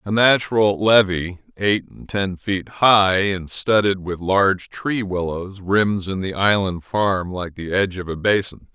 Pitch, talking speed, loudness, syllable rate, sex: 95 Hz, 170 wpm, -19 LUFS, 4.1 syllables/s, male